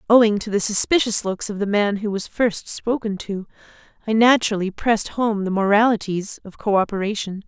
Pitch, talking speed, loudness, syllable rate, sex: 210 Hz, 170 wpm, -20 LUFS, 5.4 syllables/s, female